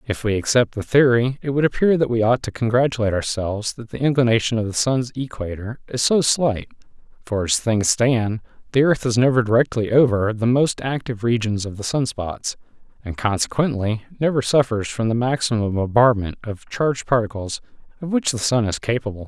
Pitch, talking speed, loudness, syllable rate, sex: 120 Hz, 185 wpm, -20 LUFS, 5.5 syllables/s, male